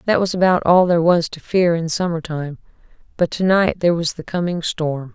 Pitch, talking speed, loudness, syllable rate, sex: 170 Hz, 220 wpm, -18 LUFS, 5.4 syllables/s, female